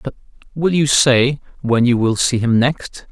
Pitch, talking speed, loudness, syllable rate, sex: 130 Hz, 190 wpm, -16 LUFS, 4.2 syllables/s, male